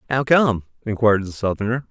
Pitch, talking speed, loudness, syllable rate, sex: 115 Hz, 160 wpm, -20 LUFS, 6.3 syllables/s, male